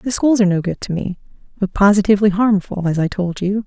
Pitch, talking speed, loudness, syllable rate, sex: 200 Hz, 230 wpm, -17 LUFS, 6.2 syllables/s, female